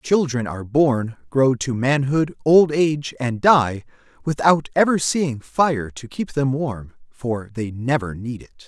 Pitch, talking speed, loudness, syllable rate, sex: 135 Hz, 160 wpm, -20 LUFS, 3.9 syllables/s, male